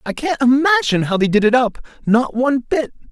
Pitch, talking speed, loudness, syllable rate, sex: 245 Hz, 195 wpm, -16 LUFS, 6.0 syllables/s, male